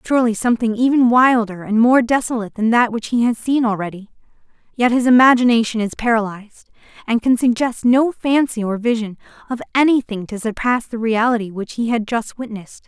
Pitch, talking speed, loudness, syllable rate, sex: 230 Hz, 170 wpm, -17 LUFS, 5.8 syllables/s, female